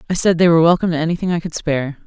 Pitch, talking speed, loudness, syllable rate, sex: 165 Hz, 290 wpm, -16 LUFS, 8.9 syllables/s, female